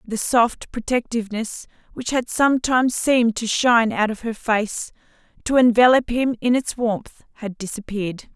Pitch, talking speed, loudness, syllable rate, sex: 230 Hz, 150 wpm, -20 LUFS, 4.9 syllables/s, female